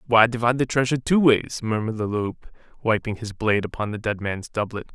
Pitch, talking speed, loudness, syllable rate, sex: 115 Hz, 205 wpm, -23 LUFS, 6.3 syllables/s, male